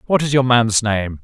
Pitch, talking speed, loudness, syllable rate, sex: 120 Hz, 245 wpm, -16 LUFS, 4.7 syllables/s, male